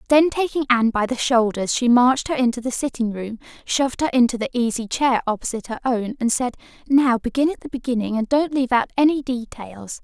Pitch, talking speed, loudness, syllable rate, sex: 245 Hz, 210 wpm, -20 LUFS, 6.0 syllables/s, female